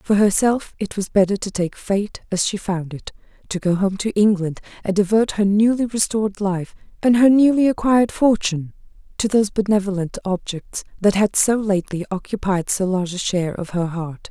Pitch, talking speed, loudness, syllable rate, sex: 200 Hz, 180 wpm, -19 LUFS, 5.4 syllables/s, female